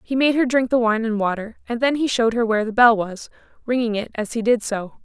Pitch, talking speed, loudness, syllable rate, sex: 230 Hz, 275 wpm, -20 LUFS, 6.1 syllables/s, female